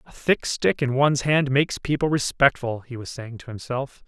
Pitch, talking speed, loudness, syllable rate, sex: 130 Hz, 205 wpm, -23 LUFS, 5.1 syllables/s, male